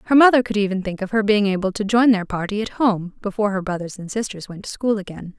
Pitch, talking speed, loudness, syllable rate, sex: 205 Hz, 270 wpm, -20 LUFS, 6.4 syllables/s, female